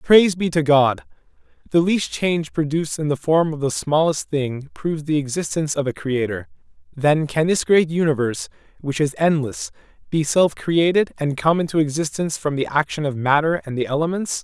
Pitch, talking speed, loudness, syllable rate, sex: 150 Hz, 185 wpm, -20 LUFS, 5.4 syllables/s, male